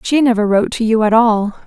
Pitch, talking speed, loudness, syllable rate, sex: 225 Hz, 255 wpm, -14 LUFS, 6.2 syllables/s, female